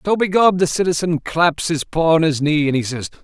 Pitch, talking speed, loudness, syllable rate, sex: 160 Hz, 240 wpm, -17 LUFS, 5.3 syllables/s, male